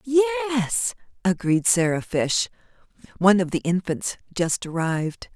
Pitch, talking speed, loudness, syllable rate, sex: 185 Hz, 110 wpm, -23 LUFS, 3.9 syllables/s, female